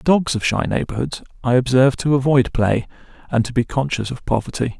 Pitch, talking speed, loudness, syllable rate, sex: 125 Hz, 200 wpm, -19 LUFS, 5.8 syllables/s, male